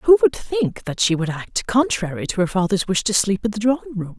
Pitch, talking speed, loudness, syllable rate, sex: 220 Hz, 260 wpm, -20 LUFS, 5.5 syllables/s, female